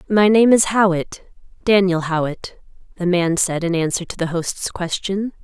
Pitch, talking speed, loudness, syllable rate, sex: 185 Hz, 165 wpm, -18 LUFS, 4.5 syllables/s, female